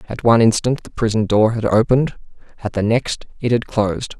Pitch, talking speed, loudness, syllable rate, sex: 110 Hz, 200 wpm, -18 LUFS, 5.9 syllables/s, male